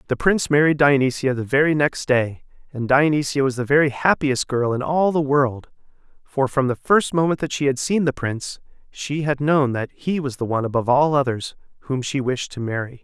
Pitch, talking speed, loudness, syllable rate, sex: 135 Hz, 210 wpm, -20 LUFS, 5.5 syllables/s, male